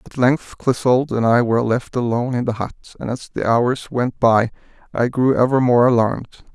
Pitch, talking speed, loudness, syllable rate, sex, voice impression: 120 Hz, 200 wpm, -18 LUFS, 5.0 syllables/s, male, very masculine, adult-like, slightly middle-aged, very thick, slightly relaxed, weak, slightly dark, hard, slightly muffled, fluent, cool, intellectual, sincere, calm, slightly mature, slightly friendly, reassuring, elegant, sweet, kind, modest